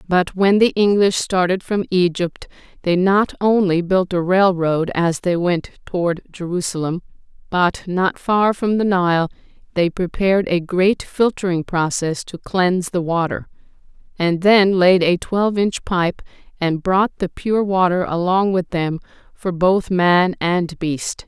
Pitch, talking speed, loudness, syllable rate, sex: 185 Hz, 150 wpm, -18 LUFS, 4.1 syllables/s, female